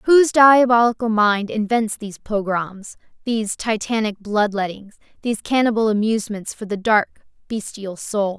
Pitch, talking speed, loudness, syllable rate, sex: 215 Hz, 120 wpm, -19 LUFS, 4.7 syllables/s, female